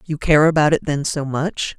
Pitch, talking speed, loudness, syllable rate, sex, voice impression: 150 Hz, 235 wpm, -18 LUFS, 4.8 syllables/s, female, feminine, middle-aged, tensed, powerful, hard, clear, intellectual, calm, elegant, lively, slightly sharp